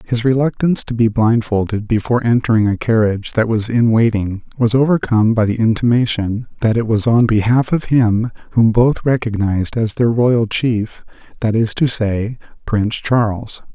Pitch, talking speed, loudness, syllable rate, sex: 115 Hz, 165 wpm, -16 LUFS, 5.0 syllables/s, male